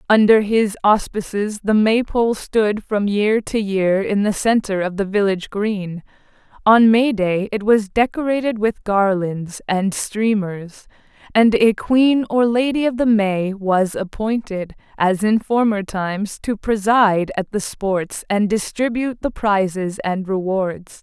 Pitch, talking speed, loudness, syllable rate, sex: 210 Hz, 150 wpm, -18 LUFS, 4.0 syllables/s, female